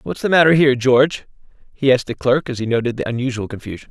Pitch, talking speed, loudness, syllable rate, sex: 130 Hz, 230 wpm, -17 LUFS, 7.2 syllables/s, male